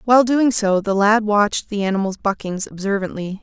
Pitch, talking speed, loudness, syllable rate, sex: 205 Hz, 175 wpm, -18 LUFS, 5.4 syllables/s, female